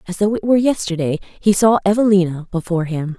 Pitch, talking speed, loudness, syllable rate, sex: 190 Hz, 190 wpm, -17 LUFS, 6.3 syllables/s, female